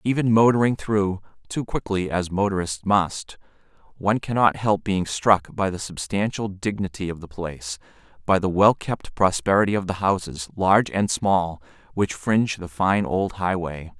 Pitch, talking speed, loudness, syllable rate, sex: 95 Hz, 160 wpm, -23 LUFS, 4.7 syllables/s, male